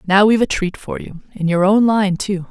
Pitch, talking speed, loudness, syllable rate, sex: 195 Hz, 265 wpm, -16 LUFS, 5.3 syllables/s, female